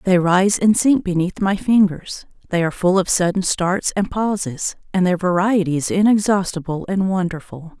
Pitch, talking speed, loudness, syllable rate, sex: 185 Hz, 170 wpm, -18 LUFS, 4.8 syllables/s, female